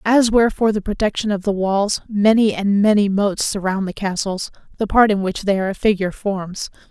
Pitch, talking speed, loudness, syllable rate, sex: 200 Hz, 210 wpm, -18 LUFS, 5.4 syllables/s, female